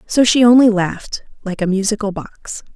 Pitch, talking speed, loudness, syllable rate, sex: 210 Hz, 175 wpm, -14 LUFS, 5.1 syllables/s, female